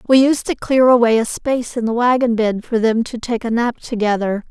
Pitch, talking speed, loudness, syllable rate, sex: 235 Hz, 240 wpm, -17 LUFS, 5.4 syllables/s, female